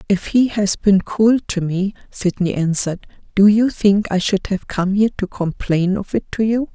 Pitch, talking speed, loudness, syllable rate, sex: 200 Hz, 205 wpm, -18 LUFS, 4.7 syllables/s, female